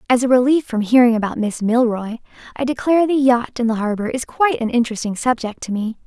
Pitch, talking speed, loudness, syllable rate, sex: 240 Hz, 220 wpm, -18 LUFS, 6.2 syllables/s, female